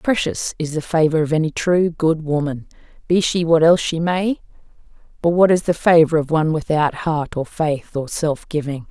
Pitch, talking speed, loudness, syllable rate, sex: 160 Hz, 195 wpm, -18 LUFS, 5.0 syllables/s, female